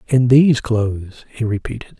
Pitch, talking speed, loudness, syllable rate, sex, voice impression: 120 Hz, 150 wpm, -16 LUFS, 5.5 syllables/s, male, masculine, middle-aged, relaxed, weak, slightly dark, slightly soft, raspy, calm, mature, slightly friendly, wild, kind, modest